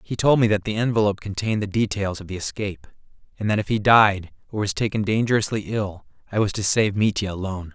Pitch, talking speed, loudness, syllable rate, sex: 100 Hz, 215 wpm, -22 LUFS, 6.3 syllables/s, male